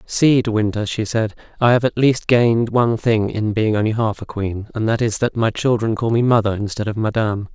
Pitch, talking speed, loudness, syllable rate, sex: 110 Hz, 240 wpm, -18 LUFS, 5.5 syllables/s, male